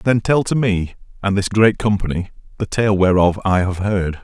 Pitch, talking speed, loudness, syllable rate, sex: 100 Hz, 200 wpm, -17 LUFS, 4.9 syllables/s, male